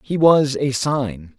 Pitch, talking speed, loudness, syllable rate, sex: 130 Hz, 175 wpm, -18 LUFS, 3.2 syllables/s, male